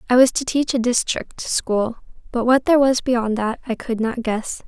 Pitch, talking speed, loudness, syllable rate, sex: 240 Hz, 220 wpm, -20 LUFS, 4.7 syllables/s, female